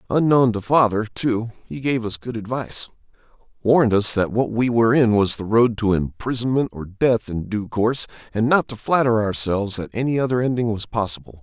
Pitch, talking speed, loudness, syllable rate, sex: 115 Hz, 195 wpm, -20 LUFS, 5.5 syllables/s, male